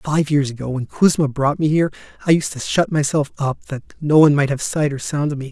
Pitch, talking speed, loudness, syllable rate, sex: 145 Hz, 260 wpm, -18 LUFS, 6.0 syllables/s, male